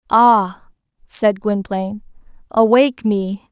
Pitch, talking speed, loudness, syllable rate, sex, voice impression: 215 Hz, 85 wpm, -17 LUFS, 3.6 syllables/s, female, very feminine, slightly gender-neutral, slightly young, slightly adult-like, very thin, very tensed, powerful, bright, very hard, very clear, fluent, very cool, intellectual, very refreshing, sincere, calm, very friendly, reassuring, slightly unique, elegant, slightly wild, sweet, slightly lively, slightly strict, slightly intense, slightly sharp